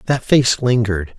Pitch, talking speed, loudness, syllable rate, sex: 115 Hz, 150 wpm, -16 LUFS, 4.9 syllables/s, male